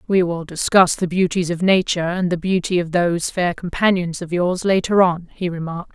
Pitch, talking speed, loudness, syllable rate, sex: 175 Hz, 200 wpm, -19 LUFS, 5.4 syllables/s, female